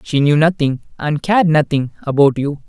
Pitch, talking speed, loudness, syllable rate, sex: 150 Hz, 180 wpm, -16 LUFS, 5.2 syllables/s, male